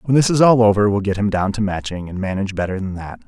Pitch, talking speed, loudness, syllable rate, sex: 105 Hz, 295 wpm, -18 LUFS, 6.8 syllables/s, male